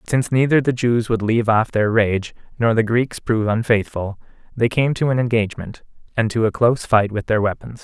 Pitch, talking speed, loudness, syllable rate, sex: 115 Hz, 215 wpm, -19 LUFS, 5.7 syllables/s, male